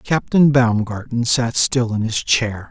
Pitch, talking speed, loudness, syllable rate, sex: 120 Hz, 155 wpm, -17 LUFS, 3.8 syllables/s, male